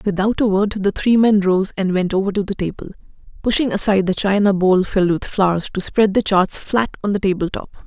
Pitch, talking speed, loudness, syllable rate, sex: 195 Hz, 230 wpm, -18 LUFS, 5.7 syllables/s, female